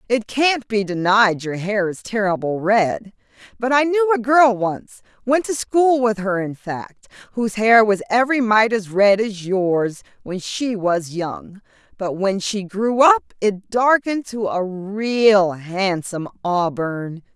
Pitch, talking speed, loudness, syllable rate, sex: 210 Hz, 155 wpm, -19 LUFS, 3.8 syllables/s, female